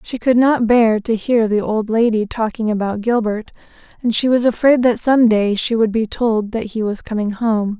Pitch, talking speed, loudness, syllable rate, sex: 225 Hz, 215 wpm, -17 LUFS, 4.7 syllables/s, female